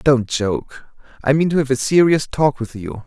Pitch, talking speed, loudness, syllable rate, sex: 135 Hz, 215 wpm, -18 LUFS, 4.7 syllables/s, male